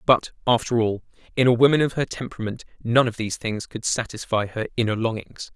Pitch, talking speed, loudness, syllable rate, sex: 115 Hz, 195 wpm, -23 LUFS, 5.9 syllables/s, male